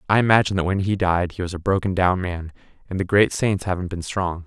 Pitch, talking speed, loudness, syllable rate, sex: 95 Hz, 240 wpm, -21 LUFS, 6.1 syllables/s, male